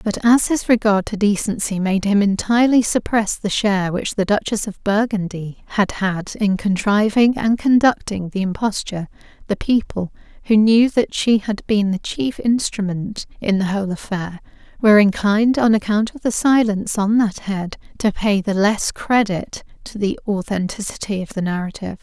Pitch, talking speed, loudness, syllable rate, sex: 205 Hz, 165 wpm, -18 LUFS, 4.9 syllables/s, female